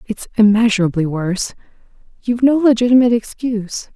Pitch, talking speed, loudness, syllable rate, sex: 220 Hz, 90 wpm, -15 LUFS, 6.2 syllables/s, female